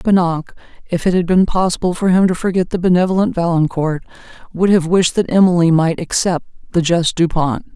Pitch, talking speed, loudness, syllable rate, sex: 175 Hz, 185 wpm, -15 LUFS, 5.4 syllables/s, female